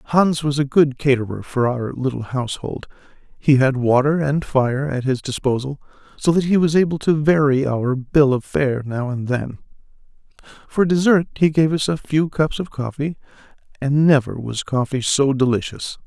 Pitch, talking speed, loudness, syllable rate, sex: 140 Hz, 175 wpm, -19 LUFS, 4.7 syllables/s, male